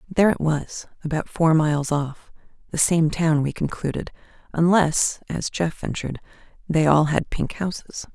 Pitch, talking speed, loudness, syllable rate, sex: 160 Hz, 155 wpm, -22 LUFS, 4.7 syllables/s, female